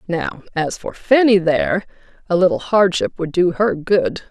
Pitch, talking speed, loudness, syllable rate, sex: 180 Hz, 165 wpm, -17 LUFS, 4.5 syllables/s, female